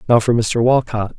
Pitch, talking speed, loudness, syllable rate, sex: 115 Hz, 205 wpm, -16 LUFS, 5.0 syllables/s, male